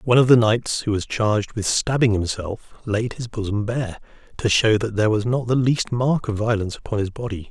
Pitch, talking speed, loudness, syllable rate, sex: 110 Hz, 225 wpm, -21 LUFS, 5.5 syllables/s, male